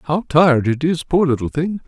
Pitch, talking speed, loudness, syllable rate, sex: 150 Hz, 225 wpm, -17 LUFS, 5.1 syllables/s, male